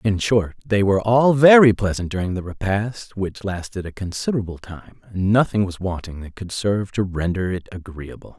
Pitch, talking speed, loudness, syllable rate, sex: 100 Hz, 185 wpm, -20 LUFS, 5.2 syllables/s, male